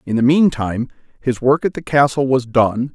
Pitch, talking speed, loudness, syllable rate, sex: 130 Hz, 205 wpm, -17 LUFS, 5.2 syllables/s, male